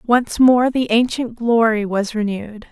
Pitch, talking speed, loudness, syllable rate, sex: 230 Hz, 155 wpm, -17 LUFS, 4.2 syllables/s, female